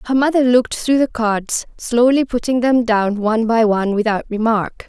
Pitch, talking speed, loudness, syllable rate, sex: 230 Hz, 185 wpm, -16 LUFS, 5.1 syllables/s, female